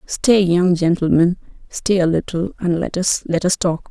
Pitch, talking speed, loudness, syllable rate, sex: 175 Hz, 170 wpm, -17 LUFS, 4.4 syllables/s, female